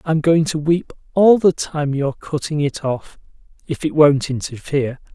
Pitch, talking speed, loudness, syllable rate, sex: 150 Hz, 175 wpm, -18 LUFS, 4.7 syllables/s, male